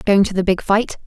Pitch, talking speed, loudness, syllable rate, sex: 200 Hz, 285 wpm, -17 LUFS, 5.7 syllables/s, female